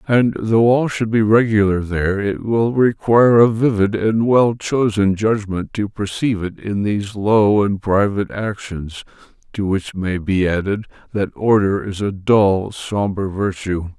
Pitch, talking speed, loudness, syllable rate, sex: 105 Hz, 160 wpm, -17 LUFS, 4.2 syllables/s, male